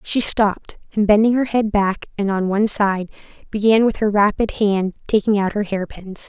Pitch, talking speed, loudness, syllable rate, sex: 205 Hz, 190 wpm, -18 LUFS, 5.0 syllables/s, female